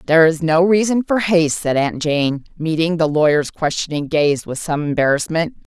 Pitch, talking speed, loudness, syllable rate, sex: 160 Hz, 175 wpm, -17 LUFS, 5.0 syllables/s, female